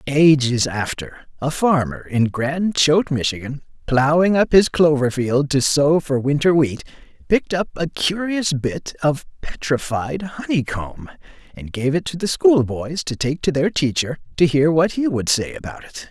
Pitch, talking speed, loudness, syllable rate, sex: 145 Hz, 170 wpm, -19 LUFS, 4.4 syllables/s, male